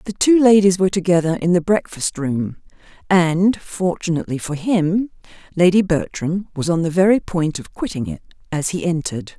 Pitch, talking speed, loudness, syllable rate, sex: 175 Hz, 165 wpm, -18 LUFS, 5.1 syllables/s, female